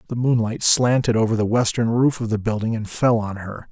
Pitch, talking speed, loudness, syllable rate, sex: 115 Hz, 225 wpm, -20 LUFS, 5.4 syllables/s, male